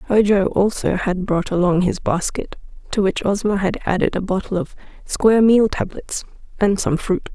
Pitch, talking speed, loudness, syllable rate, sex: 195 Hz, 170 wpm, -19 LUFS, 4.9 syllables/s, female